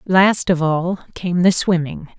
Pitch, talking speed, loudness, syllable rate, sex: 175 Hz, 165 wpm, -17 LUFS, 3.8 syllables/s, female